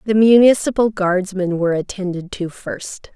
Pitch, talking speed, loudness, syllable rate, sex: 195 Hz, 135 wpm, -17 LUFS, 4.7 syllables/s, female